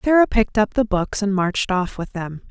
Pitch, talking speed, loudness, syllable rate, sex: 205 Hz, 240 wpm, -20 LUFS, 5.5 syllables/s, female